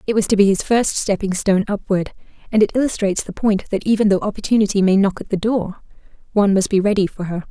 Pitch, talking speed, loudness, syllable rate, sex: 200 Hz, 225 wpm, -18 LUFS, 6.7 syllables/s, female